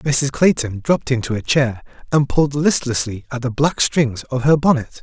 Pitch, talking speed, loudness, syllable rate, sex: 135 Hz, 190 wpm, -18 LUFS, 5.0 syllables/s, male